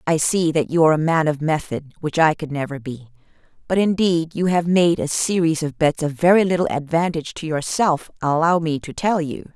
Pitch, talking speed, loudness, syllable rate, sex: 160 Hz, 215 wpm, -20 LUFS, 5.4 syllables/s, female